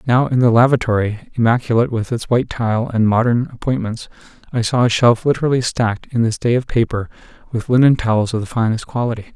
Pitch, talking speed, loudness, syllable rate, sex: 120 Hz, 190 wpm, -17 LUFS, 6.4 syllables/s, male